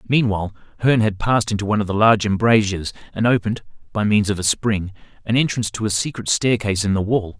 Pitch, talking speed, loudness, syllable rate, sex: 105 Hz, 210 wpm, -19 LUFS, 7.0 syllables/s, male